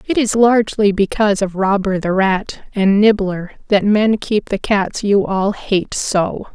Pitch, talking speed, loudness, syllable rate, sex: 200 Hz, 175 wpm, -16 LUFS, 4.1 syllables/s, female